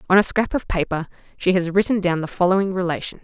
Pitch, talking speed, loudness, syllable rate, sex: 185 Hz, 225 wpm, -21 LUFS, 6.5 syllables/s, female